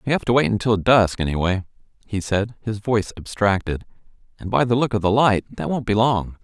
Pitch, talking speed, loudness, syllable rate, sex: 105 Hz, 215 wpm, -20 LUFS, 5.5 syllables/s, male